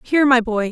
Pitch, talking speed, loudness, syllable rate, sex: 245 Hz, 250 wpm, -15 LUFS, 6.6 syllables/s, female